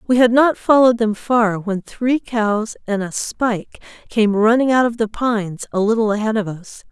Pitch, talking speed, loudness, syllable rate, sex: 225 Hz, 200 wpm, -17 LUFS, 4.8 syllables/s, female